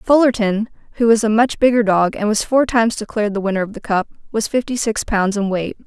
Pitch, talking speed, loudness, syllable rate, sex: 220 Hz, 235 wpm, -17 LUFS, 5.9 syllables/s, female